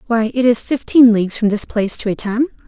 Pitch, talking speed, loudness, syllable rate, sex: 230 Hz, 225 wpm, -15 LUFS, 6.3 syllables/s, female